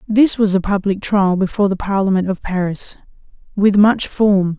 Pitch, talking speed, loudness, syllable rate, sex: 195 Hz, 170 wpm, -16 LUFS, 4.9 syllables/s, female